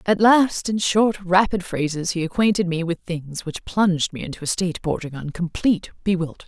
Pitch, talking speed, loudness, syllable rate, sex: 180 Hz, 195 wpm, -21 LUFS, 5.6 syllables/s, female